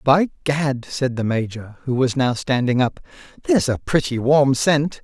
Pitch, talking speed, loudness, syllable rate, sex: 135 Hz, 180 wpm, -20 LUFS, 4.5 syllables/s, male